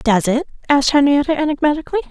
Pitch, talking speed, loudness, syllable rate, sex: 290 Hz, 140 wpm, -16 LUFS, 7.5 syllables/s, female